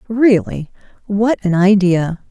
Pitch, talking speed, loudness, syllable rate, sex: 200 Hz, 105 wpm, -14 LUFS, 3.5 syllables/s, female